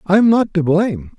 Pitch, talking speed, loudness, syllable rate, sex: 180 Hz, 255 wpm, -15 LUFS, 5.6 syllables/s, male